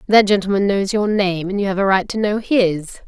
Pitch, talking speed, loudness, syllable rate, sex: 200 Hz, 255 wpm, -17 LUFS, 5.2 syllables/s, female